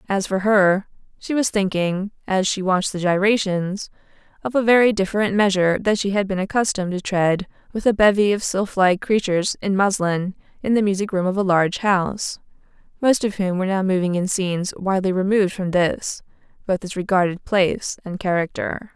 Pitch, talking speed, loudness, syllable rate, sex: 195 Hz, 185 wpm, -20 LUFS, 5.6 syllables/s, female